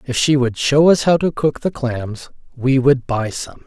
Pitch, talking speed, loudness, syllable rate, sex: 135 Hz, 230 wpm, -17 LUFS, 4.2 syllables/s, male